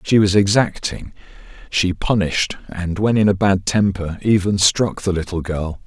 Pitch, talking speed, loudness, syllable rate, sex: 95 Hz, 165 wpm, -18 LUFS, 4.5 syllables/s, male